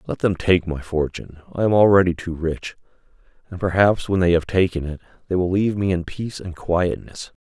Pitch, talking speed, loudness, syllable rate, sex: 90 Hz, 200 wpm, -20 LUFS, 5.6 syllables/s, male